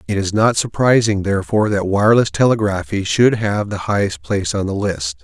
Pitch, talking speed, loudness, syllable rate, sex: 105 Hz, 185 wpm, -17 LUFS, 5.5 syllables/s, male